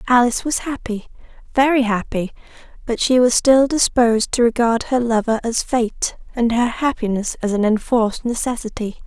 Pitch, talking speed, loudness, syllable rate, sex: 235 Hz, 150 wpm, -18 LUFS, 5.1 syllables/s, female